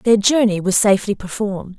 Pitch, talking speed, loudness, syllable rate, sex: 205 Hz, 170 wpm, -17 LUFS, 5.7 syllables/s, female